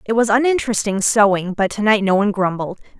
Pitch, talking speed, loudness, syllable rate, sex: 210 Hz, 180 wpm, -17 LUFS, 6.4 syllables/s, female